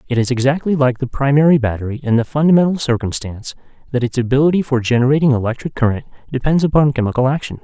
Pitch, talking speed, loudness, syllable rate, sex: 130 Hz, 175 wpm, -16 LUFS, 7.1 syllables/s, male